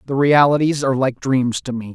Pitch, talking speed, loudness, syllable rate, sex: 130 Hz, 215 wpm, -17 LUFS, 5.7 syllables/s, male